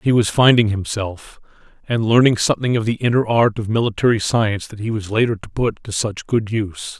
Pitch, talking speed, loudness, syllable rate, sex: 110 Hz, 205 wpm, -18 LUFS, 5.6 syllables/s, male